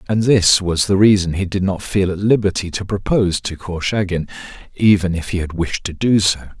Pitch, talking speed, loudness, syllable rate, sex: 95 Hz, 210 wpm, -17 LUFS, 5.4 syllables/s, male